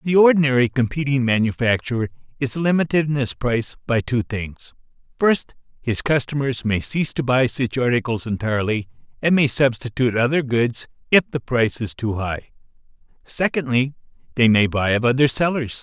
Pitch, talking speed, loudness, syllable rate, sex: 130 Hz, 150 wpm, -20 LUFS, 5.3 syllables/s, male